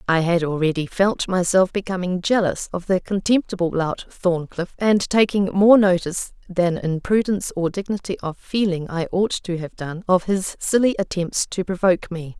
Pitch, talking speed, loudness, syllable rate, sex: 185 Hz, 170 wpm, -21 LUFS, 4.8 syllables/s, female